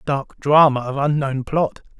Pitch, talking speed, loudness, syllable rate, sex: 140 Hz, 150 wpm, -19 LUFS, 4.0 syllables/s, male